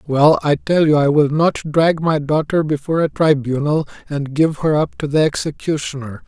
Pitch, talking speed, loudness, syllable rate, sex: 150 Hz, 190 wpm, -17 LUFS, 5.0 syllables/s, male